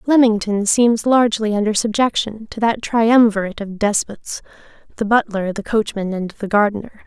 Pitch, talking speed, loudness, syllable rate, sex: 215 Hz, 135 wpm, -17 LUFS, 5.0 syllables/s, female